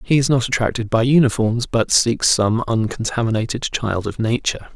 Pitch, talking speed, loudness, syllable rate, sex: 115 Hz, 165 wpm, -18 LUFS, 5.2 syllables/s, male